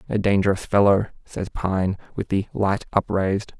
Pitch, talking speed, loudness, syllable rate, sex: 100 Hz, 150 wpm, -22 LUFS, 4.8 syllables/s, male